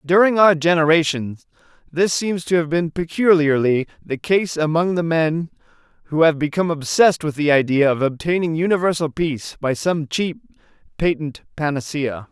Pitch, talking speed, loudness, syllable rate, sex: 160 Hz, 145 wpm, -19 LUFS, 5.1 syllables/s, male